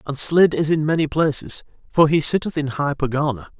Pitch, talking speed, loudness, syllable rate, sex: 150 Hz, 200 wpm, -19 LUFS, 5.3 syllables/s, male